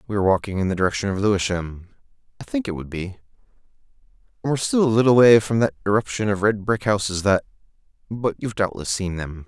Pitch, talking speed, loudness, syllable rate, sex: 100 Hz, 205 wpm, -21 LUFS, 6.3 syllables/s, male